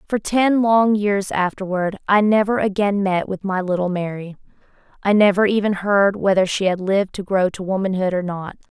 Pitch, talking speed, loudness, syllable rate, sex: 195 Hz, 185 wpm, -19 LUFS, 5.1 syllables/s, female